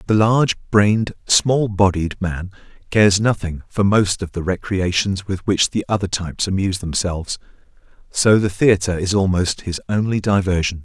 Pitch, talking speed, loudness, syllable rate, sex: 95 Hz, 155 wpm, -18 LUFS, 4.9 syllables/s, male